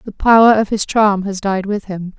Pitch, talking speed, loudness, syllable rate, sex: 200 Hz, 245 wpm, -14 LUFS, 4.9 syllables/s, female